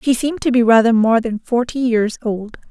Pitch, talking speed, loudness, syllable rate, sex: 235 Hz, 220 wpm, -16 LUFS, 5.2 syllables/s, female